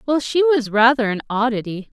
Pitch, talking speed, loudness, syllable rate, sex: 245 Hz, 180 wpm, -18 LUFS, 5.2 syllables/s, female